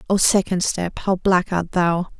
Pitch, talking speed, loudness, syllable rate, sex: 180 Hz, 190 wpm, -20 LUFS, 4.1 syllables/s, female